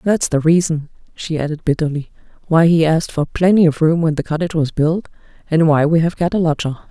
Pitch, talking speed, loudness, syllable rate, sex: 160 Hz, 215 wpm, -16 LUFS, 6.0 syllables/s, female